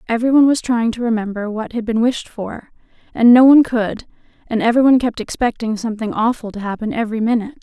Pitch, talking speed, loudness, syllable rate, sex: 230 Hz, 190 wpm, -16 LUFS, 6.5 syllables/s, female